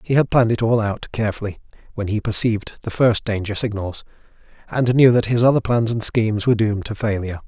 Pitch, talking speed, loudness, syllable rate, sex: 110 Hz, 210 wpm, -19 LUFS, 6.4 syllables/s, male